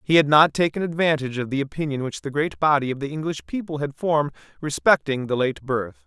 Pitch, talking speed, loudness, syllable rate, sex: 145 Hz, 220 wpm, -22 LUFS, 6.0 syllables/s, male